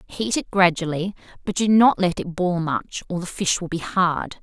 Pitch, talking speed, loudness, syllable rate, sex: 180 Hz, 215 wpm, -21 LUFS, 4.6 syllables/s, female